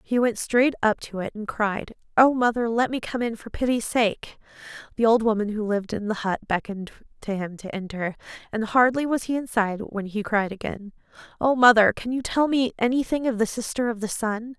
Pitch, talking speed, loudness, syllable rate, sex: 225 Hz, 215 wpm, -24 LUFS, 5.5 syllables/s, female